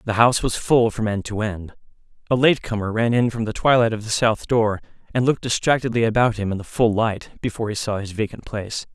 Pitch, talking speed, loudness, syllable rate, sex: 110 Hz, 235 wpm, -21 LUFS, 6.0 syllables/s, male